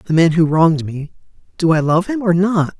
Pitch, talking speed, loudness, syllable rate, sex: 170 Hz, 235 wpm, -15 LUFS, 5.6 syllables/s, male